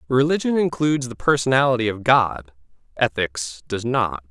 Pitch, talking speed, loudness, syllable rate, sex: 120 Hz, 125 wpm, -20 LUFS, 5.0 syllables/s, male